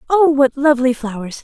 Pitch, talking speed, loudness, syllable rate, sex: 270 Hz, 165 wpm, -15 LUFS, 5.7 syllables/s, female